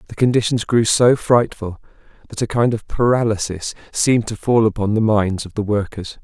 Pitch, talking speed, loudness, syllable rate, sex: 110 Hz, 185 wpm, -18 LUFS, 5.2 syllables/s, male